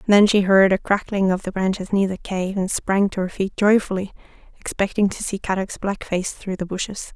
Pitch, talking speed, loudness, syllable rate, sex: 195 Hz, 220 wpm, -21 LUFS, 5.2 syllables/s, female